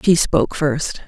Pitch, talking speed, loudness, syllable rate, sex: 145 Hz, 170 wpm, -18 LUFS, 4.2 syllables/s, female